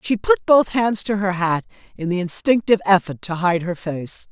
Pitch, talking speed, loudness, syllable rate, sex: 195 Hz, 210 wpm, -19 LUFS, 4.9 syllables/s, female